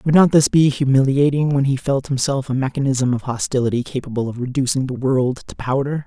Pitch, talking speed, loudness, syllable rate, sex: 135 Hz, 200 wpm, -18 LUFS, 5.8 syllables/s, male